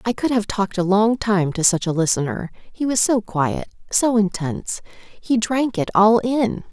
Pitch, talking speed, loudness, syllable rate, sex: 210 Hz, 195 wpm, -20 LUFS, 4.4 syllables/s, female